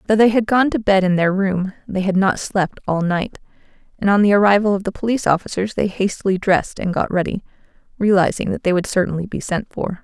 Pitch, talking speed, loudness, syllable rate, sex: 195 Hz, 220 wpm, -18 LUFS, 6.0 syllables/s, female